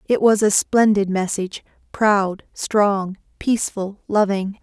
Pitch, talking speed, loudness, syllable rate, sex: 200 Hz, 115 wpm, -19 LUFS, 3.9 syllables/s, female